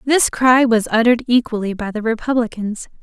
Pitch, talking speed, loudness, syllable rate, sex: 235 Hz, 160 wpm, -17 LUFS, 5.5 syllables/s, female